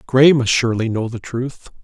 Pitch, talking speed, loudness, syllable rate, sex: 120 Hz, 195 wpm, -17 LUFS, 5.0 syllables/s, male